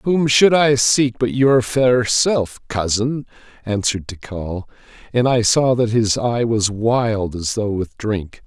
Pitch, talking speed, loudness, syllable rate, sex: 115 Hz, 155 wpm, -17 LUFS, 3.6 syllables/s, male